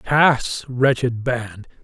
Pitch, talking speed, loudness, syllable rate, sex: 125 Hz, 100 wpm, -19 LUFS, 2.4 syllables/s, male